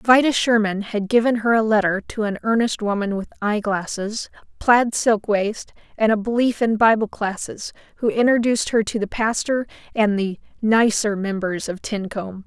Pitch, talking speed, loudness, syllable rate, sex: 215 Hz, 170 wpm, -20 LUFS, 4.8 syllables/s, female